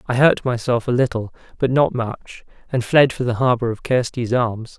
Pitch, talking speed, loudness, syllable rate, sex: 120 Hz, 200 wpm, -19 LUFS, 4.8 syllables/s, male